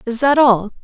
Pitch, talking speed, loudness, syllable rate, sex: 245 Hz, 215 wpm, -14 LUFS, 4.9 syllables/s, female